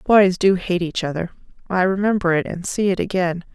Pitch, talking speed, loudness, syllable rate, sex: 185 Hz, 205 wpm, -20 LUFS, 5.3 syllables/s, female